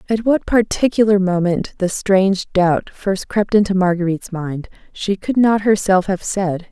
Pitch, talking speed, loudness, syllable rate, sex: 195 Hz, 160 wpm, -17 LUFS, 4.5 syllables/s, female